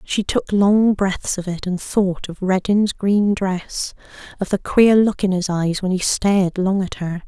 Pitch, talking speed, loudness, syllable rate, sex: 190 Hz, 205 wpm, -19 LUFS, 4.1 syllables/s, female